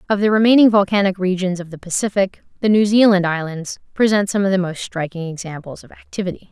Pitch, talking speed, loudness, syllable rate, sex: 190 Hz, 195 wpm, -17 LUFS, 6.2 syllables/s, female